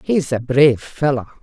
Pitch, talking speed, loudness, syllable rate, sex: 135 Hz, 170 wpm, -17 LUFS, 4.8 syllables/s, female